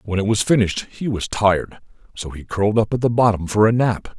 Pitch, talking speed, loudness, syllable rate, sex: 105 Hz, 245 wpm, -19 LUFS, 5.9 syllables/s, male